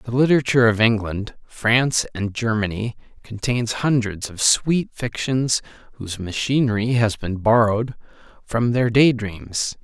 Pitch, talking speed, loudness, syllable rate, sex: 115 Hz, 130 wpm, -20 LUFS, 4.5 syllables/s, male